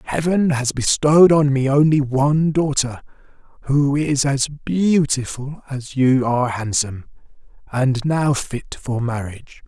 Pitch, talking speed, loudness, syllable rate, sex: 135 Hz, 130 wpm, -18 LUFS, 4.2 syllables/s, male